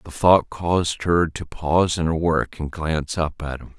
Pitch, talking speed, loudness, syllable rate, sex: 80 Hz, 220 wpm, -21 LUFS, 4.7 syllables/s, male